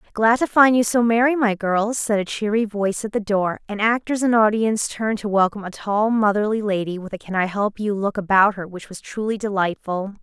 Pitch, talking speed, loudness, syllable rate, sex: 210 Hz, 230 wpm, -20 LUFS, 5.6 syllables/s, female